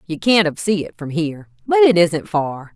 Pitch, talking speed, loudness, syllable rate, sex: 175 Hz, 240 wpm, -17 LUFS, 4.9 syllables/s, female